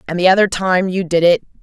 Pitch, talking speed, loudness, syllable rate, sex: 180 Hz, 260 wpm, -15 LUFS, 6.2 syllables/s, female